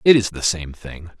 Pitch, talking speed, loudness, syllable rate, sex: 95 Hz, 250 wpm, -19 LUFS, 4.9 syllables/s, male